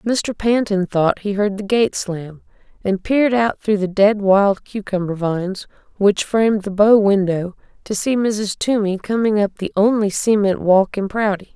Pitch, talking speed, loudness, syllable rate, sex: 205 Hz, 175 wpm, -18 LUFS, 4.4 syllables/s, female